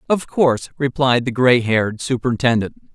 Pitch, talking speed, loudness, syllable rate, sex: 125 Hz, 145 wpm, -18 LUFS, 5.2 syllables/s, male